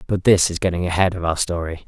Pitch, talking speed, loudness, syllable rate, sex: 90 Hz, 255 wpm, -19 LUFS, 6.4 syllables/s, male